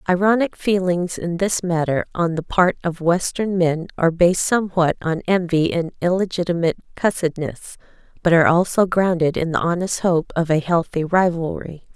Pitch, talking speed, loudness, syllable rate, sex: 175 Hz, 155 wpm, -19 LUFS, 5.1 syllables/s, female